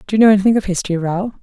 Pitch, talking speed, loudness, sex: 195 Hz, 295 wpm, -15 LUFS, female